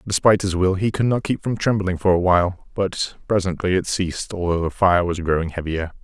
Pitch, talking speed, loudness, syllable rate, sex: 95 Hz, 220 wpm, -20 LUFS, 5.7 syllables/s, male